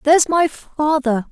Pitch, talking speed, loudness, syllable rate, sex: 295 Hz, 135 wpm, -17 LUFS, 4.2 syllables/s, female